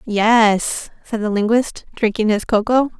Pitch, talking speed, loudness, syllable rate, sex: 220 Hz, 140 wpm, -17 LUFS, 3.9 syllables/s, female